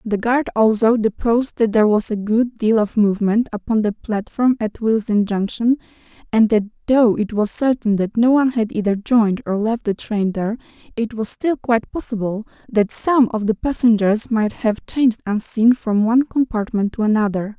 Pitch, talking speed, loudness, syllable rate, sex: 220 Hz, 185 wpm, -18 LUFS, 5.2 syllables/s, female